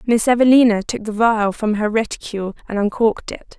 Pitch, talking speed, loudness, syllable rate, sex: 220 Hz, 185 wpm, -17 LUFS, 5.7 syllables/s, female